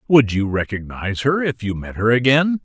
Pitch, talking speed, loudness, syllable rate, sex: 120 Hz, 205 wpm, -19 LUFS, 5.3 syllables/s, male